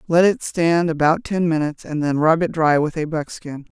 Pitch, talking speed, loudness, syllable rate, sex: 160 Hz, 220 wpm, -19 LUFS, 5.1 syllables/s, female